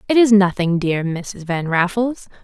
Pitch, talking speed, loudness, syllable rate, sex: 195 Hz, 175 wpm, -18 LUFS, 4.3 syllables/s, female